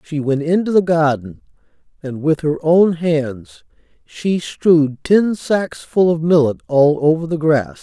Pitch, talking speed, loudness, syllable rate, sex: 160 Hz, 160 wpm, -16 LUFS, 4.0 syllables/s, male